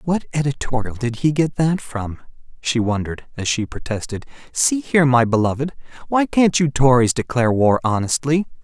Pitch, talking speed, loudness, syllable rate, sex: 130 Hz, 160 wpm, -19 LUFS, 5.3 syllables/s, male